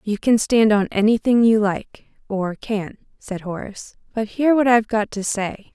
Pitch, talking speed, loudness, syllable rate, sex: 215 Hz, 175 wpm, -19 LUFS, 4.7 syllables/s, female